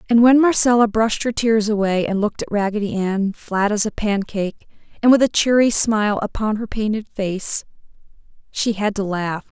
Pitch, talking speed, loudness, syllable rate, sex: 215 Hz, 180 wpm, -19 LUFS, 5.2 syllables/s, female